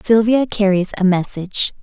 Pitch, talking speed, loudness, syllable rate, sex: 200 Hz, 130 wpm, -17 LUFS, 5.0 syllables/s, female